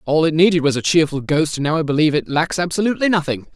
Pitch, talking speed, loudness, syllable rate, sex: 160 Hz, 255 wpm, -17 LUFS, 7.1 syllables/s, male